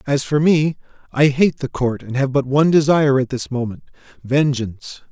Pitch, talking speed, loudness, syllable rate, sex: 140 Hz, 175 wpm, -18 LUFS, 5.3 syllables/s, male